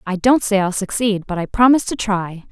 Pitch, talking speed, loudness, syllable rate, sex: 205 Hz, 240 wpm, -17 LUFS, 5.6 syllables/s, female